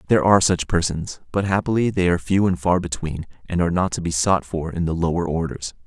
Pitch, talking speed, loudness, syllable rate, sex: 90 Hz, 235 wpm, -21 LUFS, 6.2 syllables/s, male